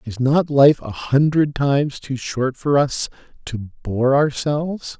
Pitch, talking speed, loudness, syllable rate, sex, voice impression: 135 Hz, 145 wpm, -19 LUFS, 3.8 syllables/s, male, very masculine, very adult-like, middle-aged, very thick, slightly relaxed, slightly weak, slightly bright, slightly hard, slightly muffled, slightly fluent, slightly raspy, very cool, very intellectual, very sincere, very calm, very mature, friendly, very reassuring, wild, slightly sweet, slightly lively, kind, slightly modest